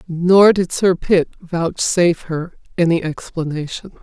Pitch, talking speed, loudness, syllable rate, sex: 170 Hz, 120 wpm, -17 LUFS, 4.0 syllables/s, female